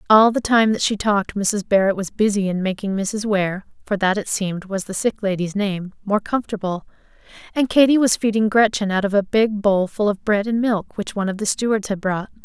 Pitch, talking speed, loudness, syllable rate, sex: 205 Hz, 215 wpm, -20 LUFS, 5.5 syllables/s, female